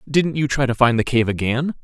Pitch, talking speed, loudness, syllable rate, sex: 130 Hz, 260 wpm, -19 LUFS, 5.5 syllables/s, male